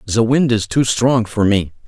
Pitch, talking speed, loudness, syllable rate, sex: 115 Hz, 225 wpm, -16 LUFS, 4.5 syllables/s, male